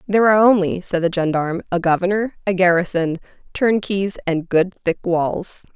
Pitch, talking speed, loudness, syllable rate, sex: 185 Hz, 155 wpm, -18 LUFS, 5.3 syllables/s, female